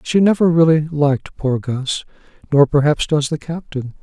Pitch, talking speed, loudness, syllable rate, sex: 150 Hz, 150 wpm, -17 LUFS, 4.7 syllables/s, male